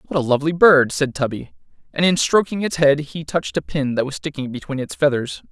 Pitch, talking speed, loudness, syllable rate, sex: 145 Hz, 230 wpm, -19 LUFS, 5.8 syllables/s, male